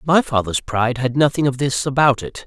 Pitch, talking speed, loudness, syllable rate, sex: 130 Hz, 220 wpm, -18 LUFS, 5.5 syllables/s, male